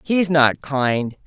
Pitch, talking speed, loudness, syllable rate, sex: 145 Hz, 140 wpm, -18 LUFS, 2.7 syllables/s, female